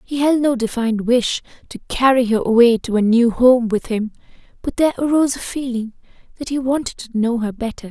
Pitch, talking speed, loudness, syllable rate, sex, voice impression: 245 Hz, 205 wpm, -18 LUFS, 5.7 syllables/s, female, very feminine, very young, very thin, slightly relaxed, weak, dark, very soft, very clear, fluent, slightly raspy, very cute, very intellectual, refreshing, very sincere, very calm, very friendly, very reassuring, very unique, very elegant, slightly wild, very sweet, lively, very kind, slightly intense, slightly sharp, slightly modest, very light